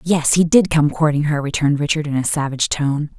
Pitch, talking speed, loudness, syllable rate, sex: 150 Hz, 225 wpm, -17 LUFS, 5.9 syllables/s, female